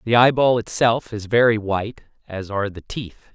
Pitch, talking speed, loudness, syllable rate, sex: 110 Hz, 180 wpm, -20 LUFS, 5.1 syllables/s, male